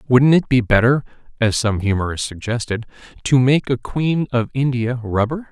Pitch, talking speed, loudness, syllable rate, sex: 125 Hz, 165 wpm, -18 LUFS, 4.9 syllables/s, male